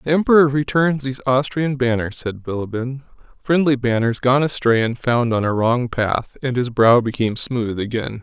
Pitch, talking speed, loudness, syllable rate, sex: 125 Hz, 175 wpm, -19 LUFS, 5.0 syllables/s, male